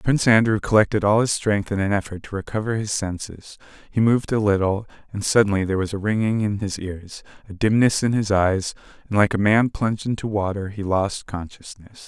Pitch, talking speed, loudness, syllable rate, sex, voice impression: 105 Hz, 205 wpm, -21 LUFS, 5.6 syllables/s, male, masculine, adult-like, tensed, slightly soft, clear, cool, intellectual, sincere, calm, slightly friendly, reassuring, wild, slightly lively, kind